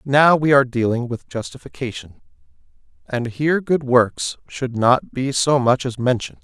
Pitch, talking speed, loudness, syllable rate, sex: 125 Hz, 160 wpm, -19 LUFS, 4.8 syllables/s, male